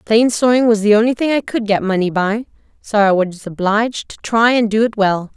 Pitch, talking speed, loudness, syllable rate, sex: 215 Hz, 235 wpm, -15 LUFS, 5.3 syllables/s, female